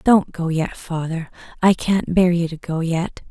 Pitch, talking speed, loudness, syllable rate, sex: 170 Hz, 200 wpm, -20 LUFS, 4.1 syllables/s, female